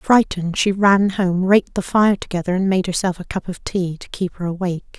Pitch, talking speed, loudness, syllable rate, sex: 185 Hz, 230 wpm, -19 LUFS, 5.5 syllables/s, female